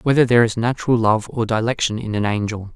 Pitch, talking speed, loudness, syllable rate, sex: 115 Hz, 215 wpm, -19 LUFS, 6.5 syllables/s, male